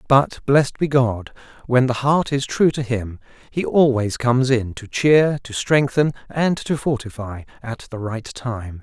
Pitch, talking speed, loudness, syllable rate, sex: 125 Hz, 175 wpm, -20 LUFS, 4.2 syllables/s, male